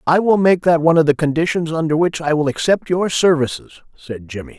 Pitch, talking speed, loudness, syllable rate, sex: 160 Hz, 225 wpm, -16 LUFS, 5.9 syllables/s, male